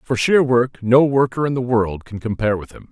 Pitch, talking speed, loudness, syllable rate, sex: 120 Hz, 245 wpm, -18 LUFS, 5.4 syllables/s, male